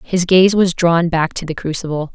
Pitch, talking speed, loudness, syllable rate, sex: 170 Hz, 225 wpm, -15 LUFS, 4.9 syllables/s, female